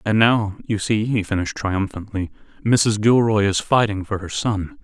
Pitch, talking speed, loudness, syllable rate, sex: 110 Hz, 175 wpm, -20 LUFS, 4.6 syllables/s, male